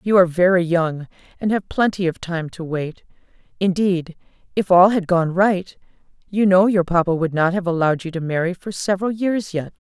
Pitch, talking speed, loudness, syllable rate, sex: 180 Hz, 195 wpm, -19 LUFS, 5.3 syllables/s, female